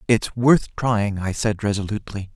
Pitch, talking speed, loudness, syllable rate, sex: 105 Hz, 155 wpm, -21 LUFS, 4.8 syllables/s, male